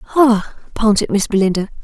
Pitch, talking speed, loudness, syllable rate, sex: 215 Hz, 130 wpm, -15 LUFS, 5.6 syllables/s, female